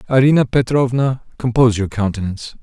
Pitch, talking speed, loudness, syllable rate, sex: 120 Hz, 115 wpm, -17 LUFS, 6.2 syllables/s, male